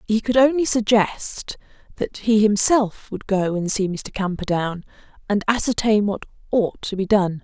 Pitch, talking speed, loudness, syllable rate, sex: 210 Hz, 160 wpm, -20 LUFS, 4.4 syllables/s, female